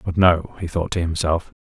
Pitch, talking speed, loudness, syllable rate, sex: 85 Hz, 220 wpm, -21 LUFS, 5.1 syllables/s, male